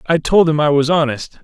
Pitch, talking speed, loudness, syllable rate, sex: 155 Hz, 250 wpm, -14 LUFS, 5.3 syllables/s, male